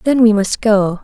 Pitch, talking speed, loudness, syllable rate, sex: 215 Hz, 230 wpm, -13 LUFS, 4.4 syllables/s, female